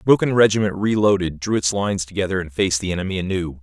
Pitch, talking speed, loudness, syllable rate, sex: 95 Hz, 215 wpm, -20 LUFS, 7.0 syllables/s, male